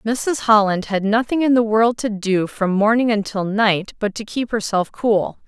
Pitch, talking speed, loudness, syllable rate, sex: 215 Hz, 195 wpm, -18 LUFS, 4.4 syllables/s, female